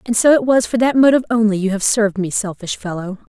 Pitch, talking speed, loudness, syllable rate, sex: 220 Hz, 250 wpm, -16 LUFS, 6.6 syllables/s, female